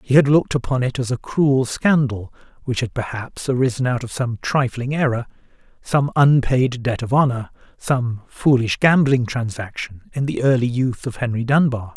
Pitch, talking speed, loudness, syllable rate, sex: 125 Hz, 170 wpm, -19 LUFS, 4.8 syllables/s, male